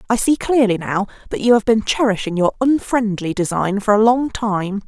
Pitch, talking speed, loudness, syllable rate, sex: 215 Hz, 195 wpm, -17 LUFS, 5.1 syllables/s, female